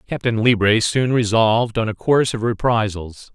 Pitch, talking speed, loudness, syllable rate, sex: 115 Hz, 160 wpm, -18 LUFS, 5.3 syllables/s, male